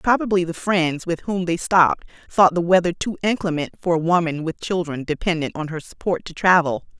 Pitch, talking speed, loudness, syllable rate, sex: 170 Hz, 195 wpm, -20 LUFS, 5.5 syllables/s, female